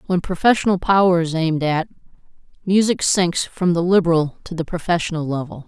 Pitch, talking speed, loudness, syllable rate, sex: 175 Hz, 160 wpm, -19 LUFS, 5.8 syllables/s, female